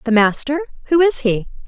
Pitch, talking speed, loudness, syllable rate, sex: 270 Hz, 145 wpm, -17 LUFS, 5.6 syllables/s, female